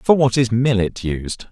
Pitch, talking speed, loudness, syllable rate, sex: 115 Hz, 200 wpm, -18 LUFS, 4.1 syllables/s, male